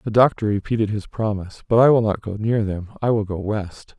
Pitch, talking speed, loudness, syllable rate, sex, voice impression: 105 Hz, 240 wpm, -21 LUFS, 5.7 syllables/s, male, masculine, adult-like, muffled, sincere, slightly calm, sweet